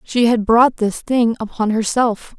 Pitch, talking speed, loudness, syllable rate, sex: 230 Hz, 175 wpm, -16 LUFS, 4.0 syllables/s, female